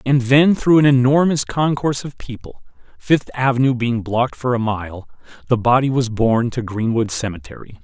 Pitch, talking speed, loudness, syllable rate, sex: 125 Hz, 170 wpm, -17 LUFS, 5.2 syllables/s, male